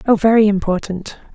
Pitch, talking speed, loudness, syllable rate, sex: 205 Hz, 135 wpm, -15 LUFS, 5.6 syllables/s, female